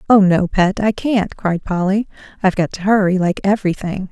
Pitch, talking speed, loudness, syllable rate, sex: 195 Hz, 190 wpm, -17 LUFS, 5.4 syllables/s, female